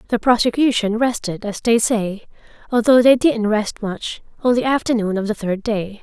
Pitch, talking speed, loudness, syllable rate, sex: 225 Hz, 180 wpm, -18 LUFS, 4.8 syllables/s, female